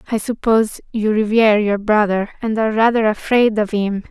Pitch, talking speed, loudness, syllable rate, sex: 215 Hz, 175 wpm, -17 LUFS, 5.5 syllables/s, female